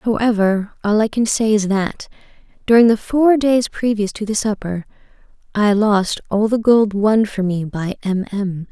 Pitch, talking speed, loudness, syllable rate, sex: 210 Hz, 180 wpm, -17 LUFS, 4.3 syllables/s, female